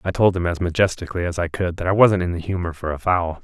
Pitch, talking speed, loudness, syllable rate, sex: 90 Hz, 295 wpm, -21 LUFS, 6.6 syllables/s, male